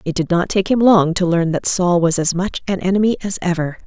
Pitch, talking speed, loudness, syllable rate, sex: 180 Hz, 265 wpm, -17 LUFS, 5.6 syllables/s, female